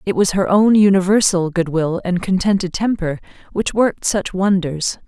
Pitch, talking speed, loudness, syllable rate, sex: 185 Hz, 165 wpm, -17 LUFS, 4.8 syllables/s, female